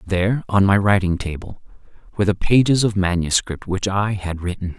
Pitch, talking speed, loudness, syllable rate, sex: 95 Hz, 175 wpm, -19 LUFS, 5.4 syllables/s, male